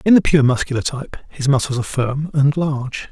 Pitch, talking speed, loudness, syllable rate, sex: 140 Hz, 210 wpm, -18 LUFS, 5.8 syllables/s, male